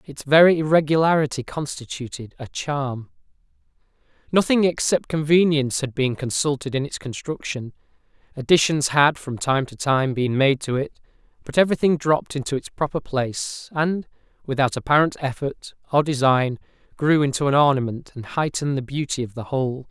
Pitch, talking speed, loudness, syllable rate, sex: 140 Hz, 150 wpm, -21 LUFS, 5.3 syllables/s, male